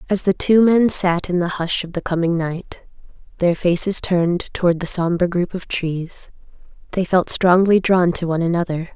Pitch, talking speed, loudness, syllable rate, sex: 175 Hz, 190 wpm, -18 LUFS, 4.9 syllables/s, female